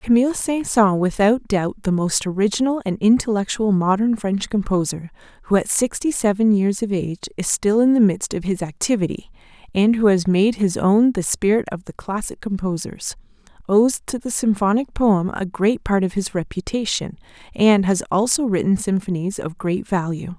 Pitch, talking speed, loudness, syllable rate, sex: 205 Hz, 175 wpm, -19 LUFS, 5.0 syllables/s, female